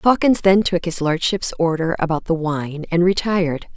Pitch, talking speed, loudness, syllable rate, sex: 175 Hz, 175 wpm, -19 LUFS, 4.7 syllables/s, female